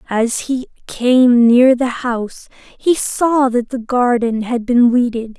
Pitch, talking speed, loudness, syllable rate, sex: 245 Hz, 155 wpm, -15 LUFS, 3.5 syllables/s, female